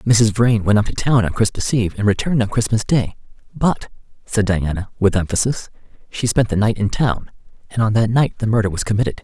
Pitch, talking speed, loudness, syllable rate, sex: 110 Hz, 215 wpm, -18 LUFS, 5.8 syllables/s, male